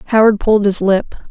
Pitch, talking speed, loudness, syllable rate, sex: 205 Hz, 185 wpm, -13 LUFS, 5.1 syllables/s, female